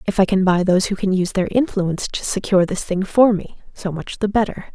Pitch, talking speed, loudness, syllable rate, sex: 190 Hz, 255 wpm, -19 LUFS, 6.2 syllables/s, female